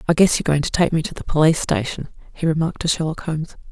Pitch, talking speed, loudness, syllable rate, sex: 160 Hz, 260 wpm, -20 LUFS, 7.5 syllables/s, female